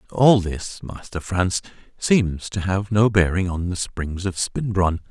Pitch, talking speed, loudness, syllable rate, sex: 95 Hz, 165 wpm, -22 LUFS, 3.9 syllables/s, male